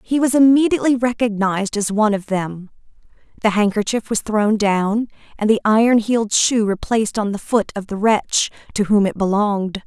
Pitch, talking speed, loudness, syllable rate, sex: 215 Hz, 175 wpm, -18 LUFS, 5.4 syllables/s, female